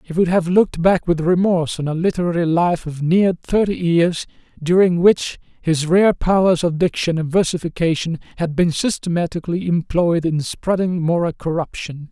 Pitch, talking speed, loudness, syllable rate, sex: 170 Hz, 160 wpm, -18 LUFS, 5.0 syllables/s, male